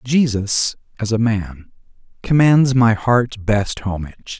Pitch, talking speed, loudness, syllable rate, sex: 115 Hz, 125 wpm, -17 LUFS, 3.6 syllables/s, male